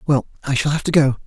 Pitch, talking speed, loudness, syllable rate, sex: 145 Hz, 240 wpm, -19 LUFS, 7.1 syllables/s, male